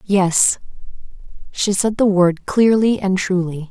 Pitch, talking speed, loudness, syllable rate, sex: 195 Hz, 130 wpm, -16 LUFS, 3.7 syllables/s, female